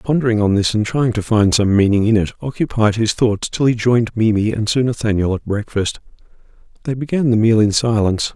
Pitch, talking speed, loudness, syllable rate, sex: 110 Hz, 210 wpm, -16 LUFS, 5.7 syllables/s, male